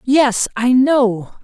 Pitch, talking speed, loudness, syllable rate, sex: 245 Hz, 125 wpm, -15 LUFS, 2.6 syllables/s, female